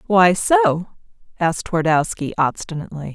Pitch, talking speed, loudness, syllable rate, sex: 180 Hz, 95 wpm, -19 LUFS, 4.9 syllables/s, female